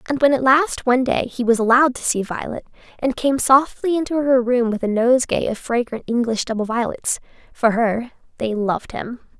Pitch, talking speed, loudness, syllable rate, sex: 245 Hz, 200 wpm, -19 LUFS, 5.4 syllables/s, female